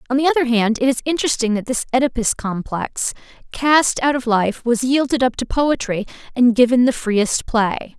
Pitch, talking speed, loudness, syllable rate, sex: 245 Hz, 190 wpm, -18 LUFS, 5.0 syllables/s, female